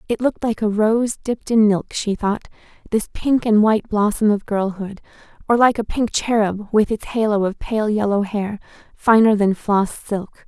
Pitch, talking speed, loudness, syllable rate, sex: 215 Hz, 190 wpm, -19 LUFS, 4.7 syllables/s, female